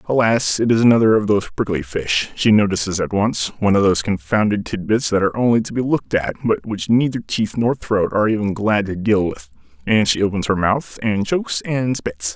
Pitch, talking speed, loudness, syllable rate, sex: 105 Hz, 225 wpm, -18 LUFS, 5.6 syllables/s, male